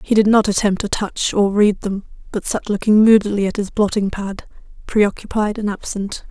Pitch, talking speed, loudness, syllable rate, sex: 205 Hz, 190 wpm, -18 LUFS, 5.1 syllables/s, female